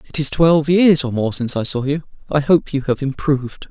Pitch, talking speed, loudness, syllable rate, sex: 145 Hz, 245 wpm, -17 LUFS, 5.8 syllables/s, male